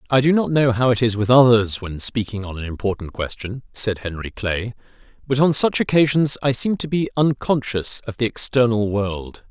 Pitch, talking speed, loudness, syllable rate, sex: 120 Hz, 195 wpm, -19 LUFS, 5.1 syllables/s, male